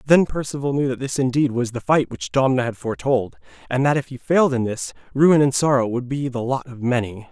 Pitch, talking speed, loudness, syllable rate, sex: 130 Hz, 240 wpm, -21 LUFS, 5.8 syllables/s, male